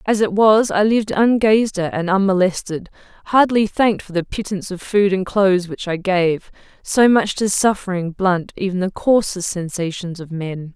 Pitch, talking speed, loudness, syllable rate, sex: 195 Hz, 180 wpm, -18 LUFS, 4.9 syllables/s, female